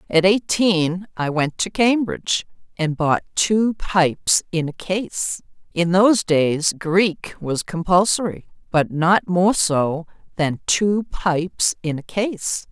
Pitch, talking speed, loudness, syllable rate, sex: 180 Hz, 135 wpm, -20 LUFS, 3.5 syllables/s, female